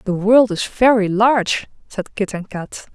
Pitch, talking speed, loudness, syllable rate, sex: 210 Hz, 185 wpm, -16 LUFS, 4.3 syllables/s, female